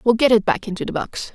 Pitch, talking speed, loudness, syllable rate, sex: 230 Hz, 315 wpm, -20 LUFS, 6.4 syllables/s, female